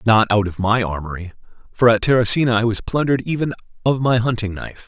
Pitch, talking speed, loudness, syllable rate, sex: 115 Hz, 195 wpm, -18 LUFS, 6.5 syllables/s, male